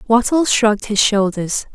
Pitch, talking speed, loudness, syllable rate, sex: 220 Hz, 140 wpm, -16 LUFS, 4.5 syllables/s, female